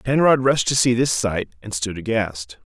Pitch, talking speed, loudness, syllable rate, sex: 115 Hz, 200 wpm, -20 LUFS, 4.6 syllables/s, male